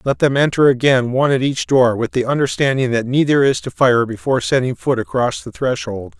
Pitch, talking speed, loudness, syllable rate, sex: 130 Hz, 205 wpm, -16 LUFS, 5.6 syllables/s, male